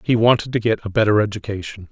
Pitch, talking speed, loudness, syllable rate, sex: 105 Hz, 220 wpm, -19 LUFS, 6.6 syllables/s, male